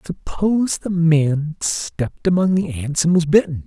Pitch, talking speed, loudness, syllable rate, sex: 165 Hz, 165 wpm, -18 LUFS, 4.3 syllables/s, male